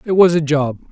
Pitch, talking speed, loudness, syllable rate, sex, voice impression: 155 Hz, 265 wpm, -15 LUFS, 5.5 syllables/s, male, very masculine, slightly old, very thick, slightly tensed, slightly bright, slightly soft, clear, fluent, slightly raspy, slightly cool, intellectual, slightly refreshing, sincere, very calm, very mature, friendly, slightly reassuring, slightly unique, elegant, wild, slightly sweet, slightly lively, kind, modest